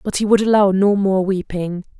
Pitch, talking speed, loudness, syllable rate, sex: 195 Hz, 210 wpm, -17 LUFS, 5.1 syllables/s, female